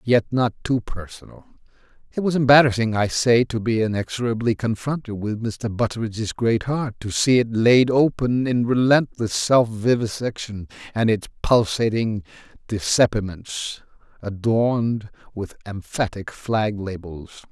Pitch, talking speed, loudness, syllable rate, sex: 115 Hz, 125 wpm, -21 LUFS, 4.5 syllables/s, male